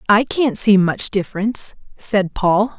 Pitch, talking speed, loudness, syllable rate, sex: 205 Hz, 150 wpm, -17 LUFS, 4.2 syllables/s, female